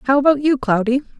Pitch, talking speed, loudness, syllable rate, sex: 265 Hz, 200 wpm, -17 LUFS, 5.9 syllables/s, female